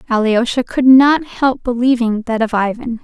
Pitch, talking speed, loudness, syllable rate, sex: 240 Hz, 160 wpm, -14 LUFS, 4.6 syllables/s, female